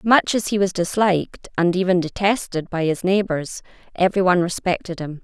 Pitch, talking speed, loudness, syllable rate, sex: 185 Hz, 160 wpm, -20 LUFS, 5.3 syllables/s, female